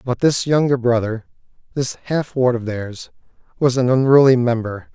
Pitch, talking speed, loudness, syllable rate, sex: 125 Hz, 160 wpm, -18 LUFS, 4.6 syllables/s, male